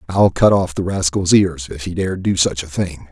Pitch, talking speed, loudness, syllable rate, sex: 90 Hz, 250 wpm, -17 LUFS, 4.8 syllables/s, male